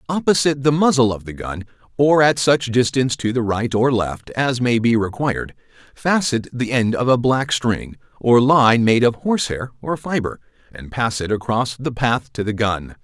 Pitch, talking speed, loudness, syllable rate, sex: 120 Hz, 195 wpm, -18 LUFS, 4.8 syllables/s, male